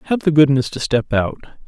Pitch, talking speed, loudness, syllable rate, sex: 140 Hz, 215 wpm, -17 LUFS, 5.8 syllables/s, male